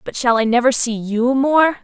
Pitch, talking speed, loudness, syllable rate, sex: 250 Hz, 230 wpm, -16 LUFS, 4.7 syllables/s, female